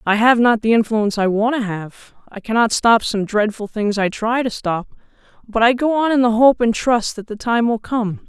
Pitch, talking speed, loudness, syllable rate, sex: 225 Hz, 240 wpm, -17 LUFS, 5.0 syllables/s, female